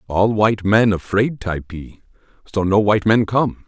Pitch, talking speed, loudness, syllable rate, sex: 100 Hz, 165 wpm, -17 LUFS, 4.7 syllables/s, male